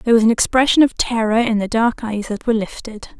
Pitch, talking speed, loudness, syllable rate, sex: 225 Hz, 245 wpm, -17 LUFS, 6.2 syllables/s, female